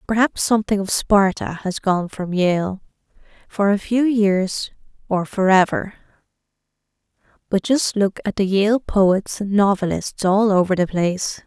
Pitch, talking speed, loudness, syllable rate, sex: 200 Hz, 140 wpm, -19 LUFS, 4.3 syllables/s, female